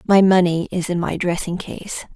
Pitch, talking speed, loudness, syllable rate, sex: 180 Hz, 195 wpm, -19 LUFS, 5.0 syllables/s, female